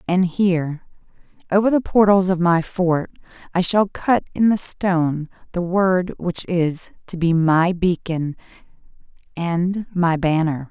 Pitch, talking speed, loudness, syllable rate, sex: 175 Hz, 140 wpm, -19 LUFS, 4.0 syllables/s, female